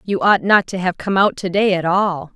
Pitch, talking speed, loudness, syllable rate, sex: 185 Hz, 280 wpm, -17 LUFS, 4.9 syllables/s, female